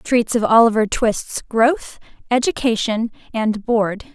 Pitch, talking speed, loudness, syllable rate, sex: 230 Hz, 115 wpm, -18 LUFS, 3.8 syllables/s, female